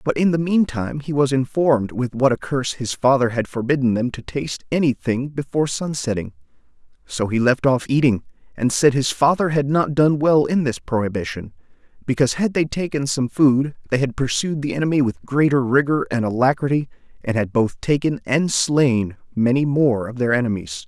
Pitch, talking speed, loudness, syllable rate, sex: 130 Hz, 195 wpm, -20 LUFS, 5.3 syllables/s, male